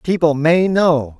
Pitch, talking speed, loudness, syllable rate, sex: 160 Hz, 150 wpm, -15 LUFS, 3.5 syllables/s, male